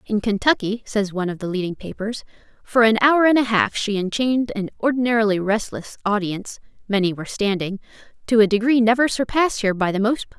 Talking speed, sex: 185 wpm, female